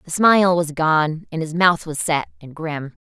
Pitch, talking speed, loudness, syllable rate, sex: 165 Hz, 220 wpm, -19 LUFS, 4.5 syllables/s, female